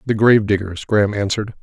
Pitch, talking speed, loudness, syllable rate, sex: 105 Hz, 185 wpm, -17 LUFS, 6.7 syllables/s, male